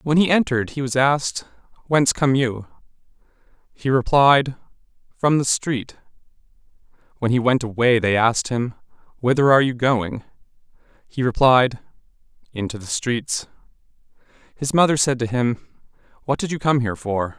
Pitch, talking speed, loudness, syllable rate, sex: 125 Hz, 140 wpm, -20 LUFS, 5.0 syllables/s, male